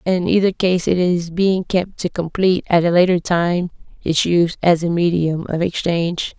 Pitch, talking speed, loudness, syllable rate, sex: 175 Hz, 190 wpm, -17 LUFS, 4.8 syllables/s, female